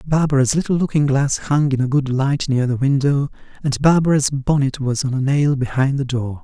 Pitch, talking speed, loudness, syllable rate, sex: 135 Hz, 205 wpm, -18 LUFS, 5.2 syllables/s, male